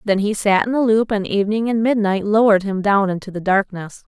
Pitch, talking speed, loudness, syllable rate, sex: 205 Hz, 230 wpm, -17 LUFS, 5.8 syllables/s, female